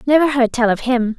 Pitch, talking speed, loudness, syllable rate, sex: 250 Hz, 255 wpm, -16 LUFS, 5.7 syllables/s, female